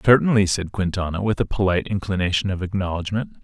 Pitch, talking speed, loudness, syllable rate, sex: 95 Hz, 155 wpm, -22 LUFS, 6.4 syllables/s, male